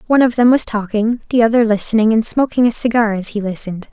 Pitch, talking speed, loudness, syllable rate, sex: 225 Hz, 230 wpm, -15 LUFS, 6.6 syllables/s, female